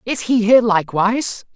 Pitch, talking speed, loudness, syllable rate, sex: 225 Hz, 155 wpm, -16 LUFS, 5.8 syllables/s, male